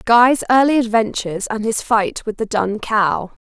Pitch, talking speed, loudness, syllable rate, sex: 220 Hz, 175 wpm, -17 LUFS, 4.5 syllables/s, female